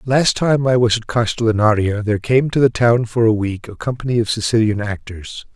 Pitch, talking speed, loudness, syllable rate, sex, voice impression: 115 Hz, 205 wpm, -17 LUFS, 5.4 syllables/s, male, masculine, slightly middle-aged, slightly thick, cool, slightly refreshing, sincere, slightly calm, slightly elegant